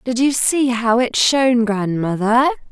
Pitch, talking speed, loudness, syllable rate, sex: 235 Hz, 155 wpm, -16 LUFS, 4.3 syllables/s, female